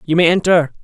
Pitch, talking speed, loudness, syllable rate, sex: 170 Hz, 215 wpm, -14 LUFS, 6.0 syllables/s, male